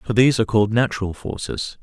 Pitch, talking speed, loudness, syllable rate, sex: 110 Hz, 195 wpm, -20 LUFS, 7.0 syllables/s, male